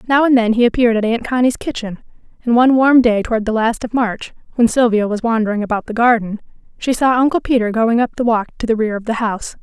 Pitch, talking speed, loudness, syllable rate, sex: 230 Hz, 245 wpm, -16 LUFS, 6.4 syllables/s, female